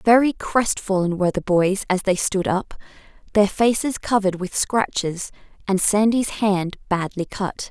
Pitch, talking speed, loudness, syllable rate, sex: 200 Hz, 150 wpm, -21 LUFS, 4.4 syllables/s, female